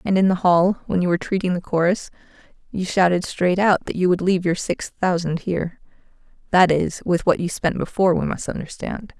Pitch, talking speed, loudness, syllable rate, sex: 180 Hz, 200 wpm, -20 LUFS, 5.5 syllables/s, female